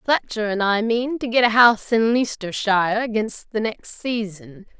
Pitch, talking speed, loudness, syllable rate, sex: 220 Hz, 175 wpm, -20 LUFS, 4.7 syllables/s, female